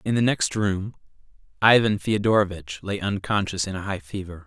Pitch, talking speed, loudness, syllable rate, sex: 100 Hz, 160 wpm, -23 LUFS, 5.2 syllables/s, male